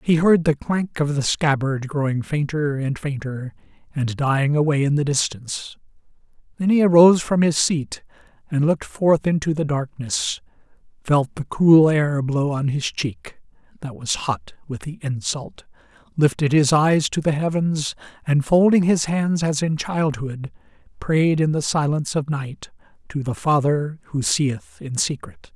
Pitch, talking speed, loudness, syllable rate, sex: 145 Hz, 160 wpm, -20 LUFS, 4.4 syllables/s, male